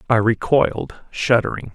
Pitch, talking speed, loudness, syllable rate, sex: 115 Hz, 105 wpm, -19 LUFS, 4.6 syllables/s, male